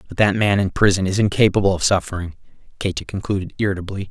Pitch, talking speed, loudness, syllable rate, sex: 95 Hz, 175 wpm, -19 LUFS, 6.9 syllables/s, male